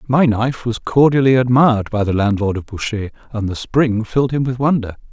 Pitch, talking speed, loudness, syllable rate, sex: 120 Hz, 200 wpm, -17 LUFS, 5.6 syllables/s, male